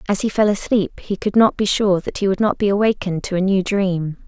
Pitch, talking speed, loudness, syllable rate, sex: 195 Hz, 265 wpm, -18 LUFS, 5.7 syllables/s, female